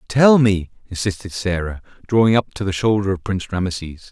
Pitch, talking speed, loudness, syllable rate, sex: 100 Hz, 175 wpm, -19 LUFS, 5.7 syllables/s, male